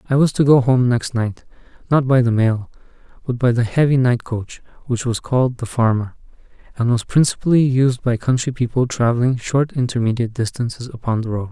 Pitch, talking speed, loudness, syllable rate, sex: 125 Hz, 190 wpm, -18 LUFS, 5.6 syllables/s, male